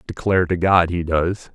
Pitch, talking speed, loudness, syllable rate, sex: 90 Hz, 195 wpm, -19 LUFS, 5.0 syllables/s, male